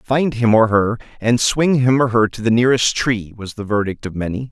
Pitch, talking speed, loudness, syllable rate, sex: 115 Hz, 240 wpm, -17 LUFS, 5.2 syllables/s, male